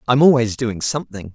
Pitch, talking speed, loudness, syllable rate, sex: 120 Hz, 180 wpm, -17 LUFS, 5.9 syllables/s, male